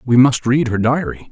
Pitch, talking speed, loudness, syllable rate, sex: 125 Hz, 230 wpm, -15 LUFS, 5.0 syllables/s, male